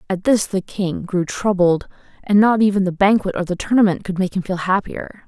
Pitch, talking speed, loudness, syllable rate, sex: 190 Hz, 215 wpm, -18 LUFS, 5.3 syllables/s, female